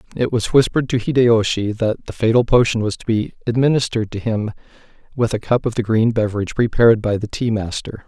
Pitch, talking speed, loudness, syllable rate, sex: 115 Hz, 200 wpm, -18 LUFS, 6.2 syllables/s, male